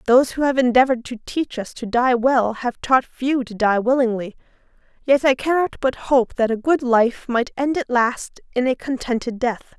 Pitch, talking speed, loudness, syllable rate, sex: 250 Hz, 200 wpm, -20 LUFS, 4.9 syllables/s, female